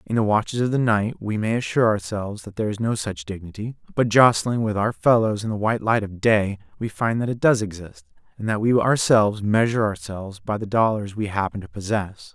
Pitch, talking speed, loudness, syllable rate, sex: 110 Hz, 225 wpm, -22 LUFS, 5.8 syllables/s, male